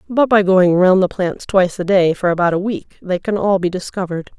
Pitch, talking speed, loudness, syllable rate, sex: 185 Hz, 245 wpm, -16 LUFS, 5.6 syllables/s, female